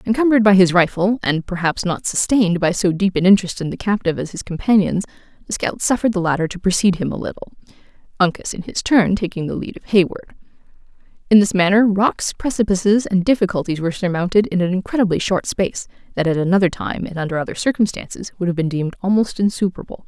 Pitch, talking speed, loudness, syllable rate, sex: 190 Hz, 195 wpm, -18 LUFS, 6.6 syllables/s, female